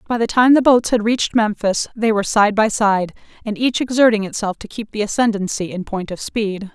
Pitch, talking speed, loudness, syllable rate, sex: 215 Hz, 220 wpm, -17 LUFS, 5.5 syllables/s, female